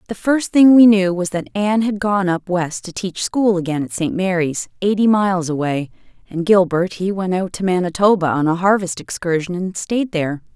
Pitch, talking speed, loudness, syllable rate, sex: 185 Hz, 205 wpm, -17 LUFS, 5.2 syllables/s, female